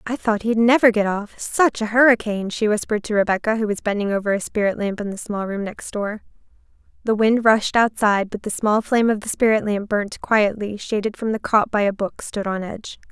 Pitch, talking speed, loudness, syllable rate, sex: 215 Hz, 225 wpm, -20 LUFS, 5.6 syllables/s, female